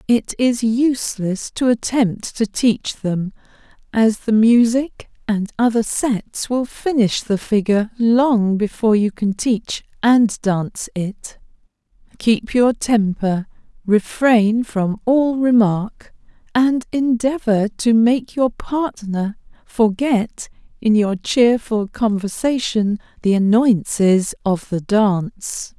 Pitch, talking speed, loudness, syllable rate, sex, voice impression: 225 Hz, 115 wpm, -18 LUFS, 3.4 syllables/s, female, feminine, adult-like, tensed, powerful, clear, intellectual, elegant, lively, slightly intense, slightly sharp